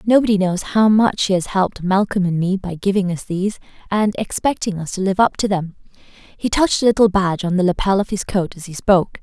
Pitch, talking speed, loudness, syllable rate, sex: 195 Hz, 235 wpm, -18 LUFS, 5.7 syllables/s, female